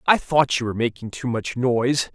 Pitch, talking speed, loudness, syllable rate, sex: 125 Hz, 225 wpm, -22 LUFS, 5.5 syllables/s, male